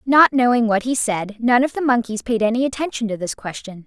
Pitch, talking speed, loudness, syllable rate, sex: 235 Hz, 235 wpm, -19 LUFS, 5.6 syllables/s, female